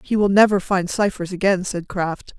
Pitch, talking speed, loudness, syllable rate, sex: 190 Hz, 200 wpm, -19 LUFS, 4.8 syllables/s, female